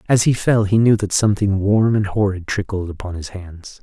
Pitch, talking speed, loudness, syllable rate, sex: 100 Hz, 220 wpm, -18 LUFS, 5.2 syllables/s, male